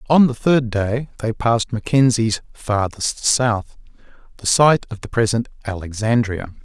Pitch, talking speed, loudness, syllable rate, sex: 115 Hz, 125 wpm, -19 LUFS, 4.3 syllables/s, male